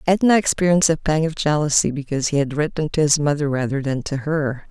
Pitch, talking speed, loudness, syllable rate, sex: 150 Hz, 215 wpm, -19 LUFS, 6.1 syllables/s, female